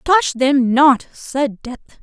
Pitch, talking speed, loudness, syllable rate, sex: 265 Hz, 150 wpm, -16 LUFS, 3.0 syllables/s, female